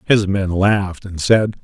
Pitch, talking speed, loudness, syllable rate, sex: 100 Hz, 185 wpm, -17 LUFS, 4.1 syllables/s, male